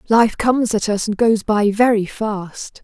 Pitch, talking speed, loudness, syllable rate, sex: 215 Hz, 190 wpm, -17 LUFS, 4.2 syllables/s, female